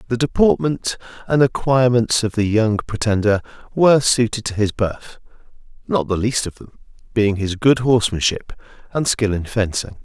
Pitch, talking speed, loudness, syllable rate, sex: 115 Hz, 155 wpm, -18 LUFS, 4.9 syllables/s, male